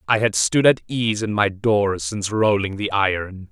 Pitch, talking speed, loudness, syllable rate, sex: 105 Hz, 205 wpm, -20 LUFS, 4.6 syllables/s, male